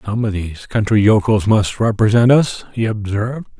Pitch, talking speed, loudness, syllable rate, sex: 105 Hz, 165 wpm, -16 LUFS, 5.1 syllables/s, male